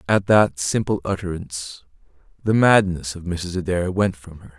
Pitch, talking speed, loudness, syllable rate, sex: 90 Hz, 155 wpm, -21 LUFS, 4.6 syllables/s, male